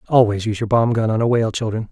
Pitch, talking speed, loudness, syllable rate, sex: 110 Hz, 285 wpm, -18 LUFS, 7.5 syllables/s, male